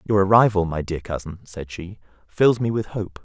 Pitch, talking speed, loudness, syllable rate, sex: 95 Hz, 205 wpm, -21 LUFS, 5.1 syllables/s, male